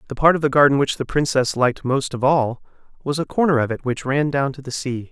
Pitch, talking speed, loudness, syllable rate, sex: 135 Hz, 270 wpm, -20 LUFS, 6.0 syllables/s, male